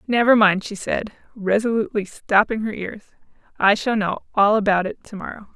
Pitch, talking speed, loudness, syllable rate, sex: 210 Hz, 175 wpm, -20 LUFS, 5.2 syllables/s, female